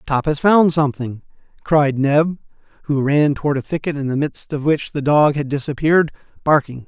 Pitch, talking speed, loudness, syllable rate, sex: 145 Hz, 185 wpm, -18 LUFS, 5.3 syllables/s, male